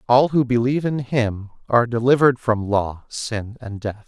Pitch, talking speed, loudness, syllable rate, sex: 120 Hz, 175 wpm, -20 LUFS, 4.9 syllables/s, male